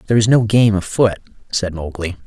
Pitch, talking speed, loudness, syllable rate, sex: 105 Hz, 185 wpm, -17 LUFS, 5.8 syllables/s, male